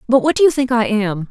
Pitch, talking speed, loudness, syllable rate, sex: 240 Hz, 320 wpm, -15 LUFS, 6.0 syllables/s, female